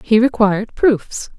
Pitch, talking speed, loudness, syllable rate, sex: 230 Hz, 130 wpm, -16 LUFS, 4.1 syllables/s, female